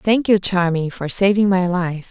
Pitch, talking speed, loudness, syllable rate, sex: 185 Hz, 200 wpm, -18 LUFS, 4.5 syllables/s, female